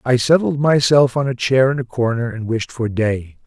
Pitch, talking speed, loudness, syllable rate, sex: 125 Hz, 225 wpm, -17 LUFS, 4.8 syllables/s, male